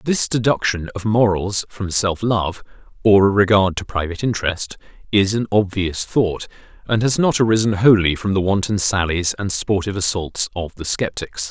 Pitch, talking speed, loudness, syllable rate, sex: 100 Hz, 165 wpm, -18 LUFS, 4.9 syllables/s, male